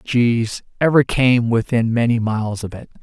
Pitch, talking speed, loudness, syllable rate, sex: 115 Hz, 160 wpm, -18 LUFS, 4.4 syllables/s, male